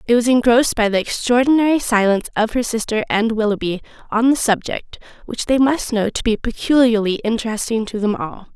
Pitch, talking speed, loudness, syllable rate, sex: 230 Hz, 180 wpm, -17 LUFS, 5.8 syllables/s, female